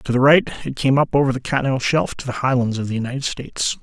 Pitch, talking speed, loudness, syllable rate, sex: 130 Hz, 265 wpm, -19 LUFS, 7.1 syllables/s, male